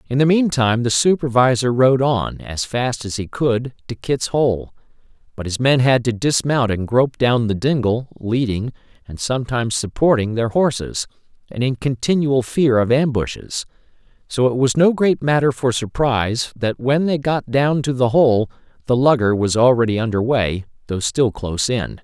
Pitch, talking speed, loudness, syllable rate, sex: 125 Hz, 175 wpm, -18 LUFS, 4.8 syllables/s, male